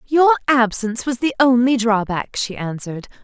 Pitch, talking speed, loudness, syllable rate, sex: 240 Hz, 150 wpm, -18 LUFS, 5.0 syllables/s, female